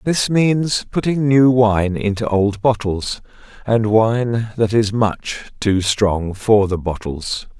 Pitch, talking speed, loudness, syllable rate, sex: 110 Hz, 140 wpm, -17 LUFS, 3.3 syllables/s, male